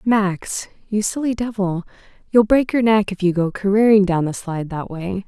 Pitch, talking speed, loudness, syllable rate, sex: 200 Hz, 195 wpm, -19 LUFS, 4.9 syllables/s, female